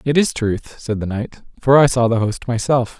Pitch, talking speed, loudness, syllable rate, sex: 120 Hz, 240 wpm, -18 LUFS, 4.8 syllables/s, male